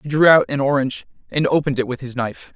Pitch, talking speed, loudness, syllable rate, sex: 135 Hz, 260 wpm, -18 LUFS, 7.0 syllables/s, male